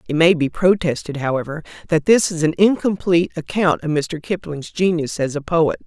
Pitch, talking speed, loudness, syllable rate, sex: 165 Hz, 185 wpm, -19 LUFS, 5.3 syllables/s, female